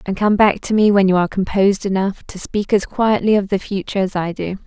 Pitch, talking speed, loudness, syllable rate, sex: 195 Hz, 255 wpm, -17 LUFS, 6.0 syllables/s, female